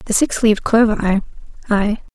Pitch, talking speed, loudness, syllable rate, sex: 215 Hz, 140 wpm, -17 LUFS, 5.7 syllables/s, female